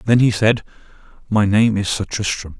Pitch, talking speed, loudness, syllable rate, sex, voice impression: 105 Hz, 185 wpm, -18 LUFS, 4.7 syllables/s, male, very masculine, very middle-aged, very thick, relaxed, weak, dark, very soft, very muffled, slightly fluent, raspy, cool, intellectual, slightly refreshing, sincere, very calm, very mature, slightly friendly, slightly reassuring, very unique, elegant, slightly wild, very sweet, kind, very modest